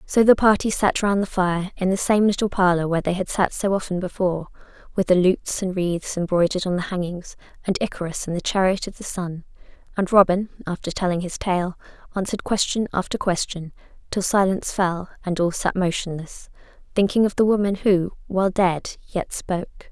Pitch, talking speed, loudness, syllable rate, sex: 185 Hz, 185 wpm, -22 LUFS, 5.7 syllables/s, female